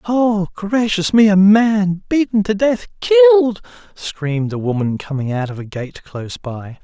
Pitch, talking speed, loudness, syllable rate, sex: 180 Hz, 160 wpm, -16 LUFS, 4.1 syllables/s, male